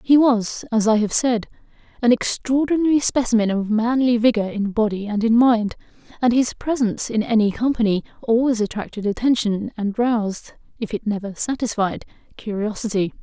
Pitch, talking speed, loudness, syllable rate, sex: 225 Hz, 150 wpm, -20 LUFS, 5.2 syllables/s, female